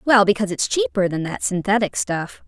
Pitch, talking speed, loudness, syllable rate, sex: 205 Hz, 195 wpm, -20 LUFS, 5.6 syllables/s, female